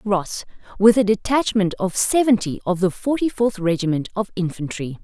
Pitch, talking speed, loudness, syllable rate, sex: 200 Hz, 155 wpm, -20 LUFS, 5.0 syllables/s, female